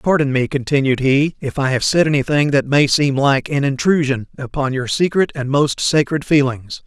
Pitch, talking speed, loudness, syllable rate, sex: 140 Hz, 190 wpm, -17 LUFS, 5.0 syllables/s, male